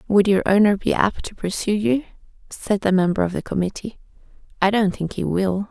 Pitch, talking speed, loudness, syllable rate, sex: 200 Hz, 200 wpm, -20 LUFS, 5.4 syllables/s, female